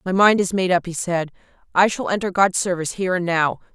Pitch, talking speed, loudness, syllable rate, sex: 180 Hz, 240 wpm, -20 LUFS, 6.2 syllables/s, female